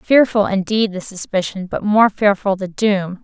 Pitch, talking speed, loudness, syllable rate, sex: 200 Hz, 150 wpm, -17 LUFS, 4.4 syllables/s, female